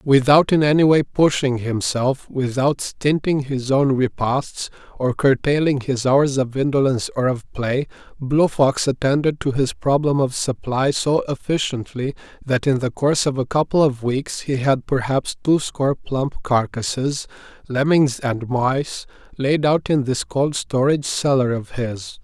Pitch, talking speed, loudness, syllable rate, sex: 135 Hz, 155 wpm, -20 LUFS, 4.3 syllables/s, male